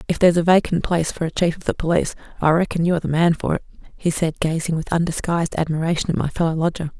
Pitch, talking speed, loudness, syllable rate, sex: 165 Hz, 250 wpm, -20 LUFS, 7.3 syllables/s, female